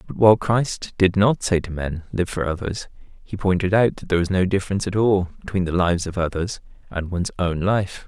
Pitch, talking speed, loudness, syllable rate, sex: 95 Hz, 225 wpm, -21 LUFS, 5.6 syllables/s, male